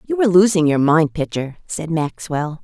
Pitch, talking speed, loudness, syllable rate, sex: 170 Hz, 185 wpm, -18 LUFS, 4.9 syllables/s, female